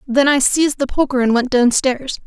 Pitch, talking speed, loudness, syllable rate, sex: 265 Hz, 210 wpm, -16 LUFS, 5.3 syllables/s, female